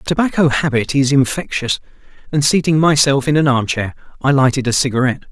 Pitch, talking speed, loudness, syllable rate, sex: 140 Hz, 180 wpm, -15 LUFS, 6.2 syllables/s, male